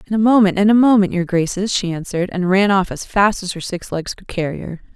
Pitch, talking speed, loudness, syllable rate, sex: 190 Hz, 265 wpm, -17 LUFS, 5.9 syllables/s, female